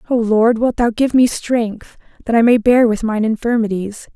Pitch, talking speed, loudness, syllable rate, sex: 230 Hz, 200 wpm, -15 LUFS, 4.7 syllables/s, female